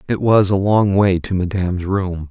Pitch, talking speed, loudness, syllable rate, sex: 95 Hz, 210 wpm, -17 LUFS, 4.7 syllables/s, male